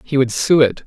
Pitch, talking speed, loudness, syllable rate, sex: 135 Hz, 280 wpm, -15 LUFS, 5.2 syllables/s, male